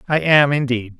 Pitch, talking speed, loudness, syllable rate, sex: 135 Hz, 180 wpm, -16 LUFS, 4.9 syllables/s, male